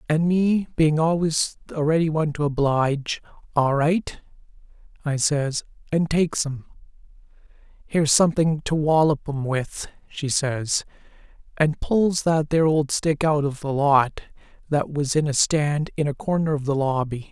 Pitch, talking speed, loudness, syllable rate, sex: 150 Hz, 155 wpm, -22 LUFS, 4.5 syllables/s, male